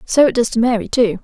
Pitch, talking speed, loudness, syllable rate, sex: 235 Hz, 290 wpm, -15 LUFS, 6.3 syllables/s, female